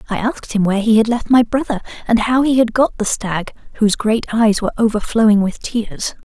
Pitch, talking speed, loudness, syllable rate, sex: 225 Hz, 220 wpm, -16 LUFS, 5.8 syllables/s, female